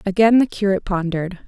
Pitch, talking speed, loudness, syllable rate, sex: 195 Hz, 160 wpm, -18 LUFS, 6.7 syllables/s, female